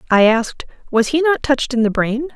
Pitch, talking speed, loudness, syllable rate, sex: 255 Hz, 230 wpm, -16 LUFS, 6.0 syllables/s, female